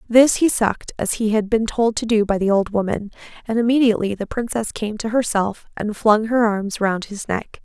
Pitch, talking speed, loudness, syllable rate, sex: 220 Hz, 220 wpm, -20 LUFS, 5.2 syllables/s, female